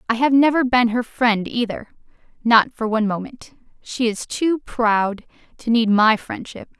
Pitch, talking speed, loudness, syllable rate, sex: 235 Hz, 170 wpm, -19 LUFS, 4.4 syllables/s, female